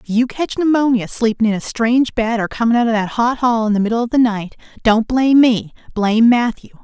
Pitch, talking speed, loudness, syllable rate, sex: 230 Hz, 235 wpm, -16 LUFS, 5.8 syllables/s, female